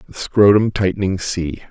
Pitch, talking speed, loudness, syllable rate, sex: 95 Hz, 105 wpm, -17 LUFS, 4.7 syllables/s, male